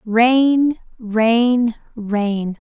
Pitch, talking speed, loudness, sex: 230 Hz, 65 wpm, -17 LUFS, female